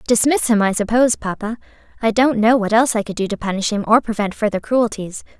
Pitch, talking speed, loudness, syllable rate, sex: 220 Hz, 220 wpm, -18 LUFS, 6.2 syllables/s, female